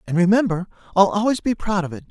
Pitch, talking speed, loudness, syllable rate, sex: 195 Hz, 230 wpm, -20 LUFS, 6.6 syllables/s, male